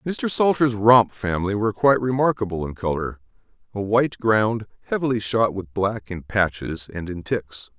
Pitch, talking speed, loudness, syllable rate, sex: 105 Hz, 155 wpm, -22 LUFS, 5.0 syllables/s, male